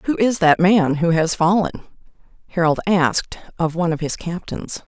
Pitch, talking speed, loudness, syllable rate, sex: 175 Hz, 170 wpm, -19 LUFS, 5.2 syllables/s, female